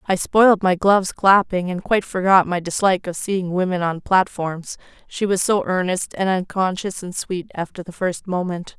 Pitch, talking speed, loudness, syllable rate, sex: 185 Hz, 185 wpm, -19 LUFS, 4.8 syllables/s, female